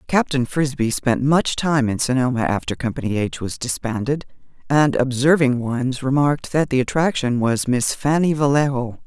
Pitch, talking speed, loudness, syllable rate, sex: 135 Hz, 150 wpm, -20 LUFS, 4.9 syllables/s, female